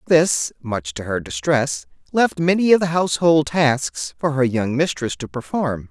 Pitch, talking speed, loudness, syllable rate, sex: 140 Hz, 175 wpm, -20 LUFS, 4.3 syllables/s, male